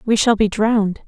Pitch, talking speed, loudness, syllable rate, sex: 215 Hz, 225 wpm, -17 LUFS, 5.3 syllables/s, female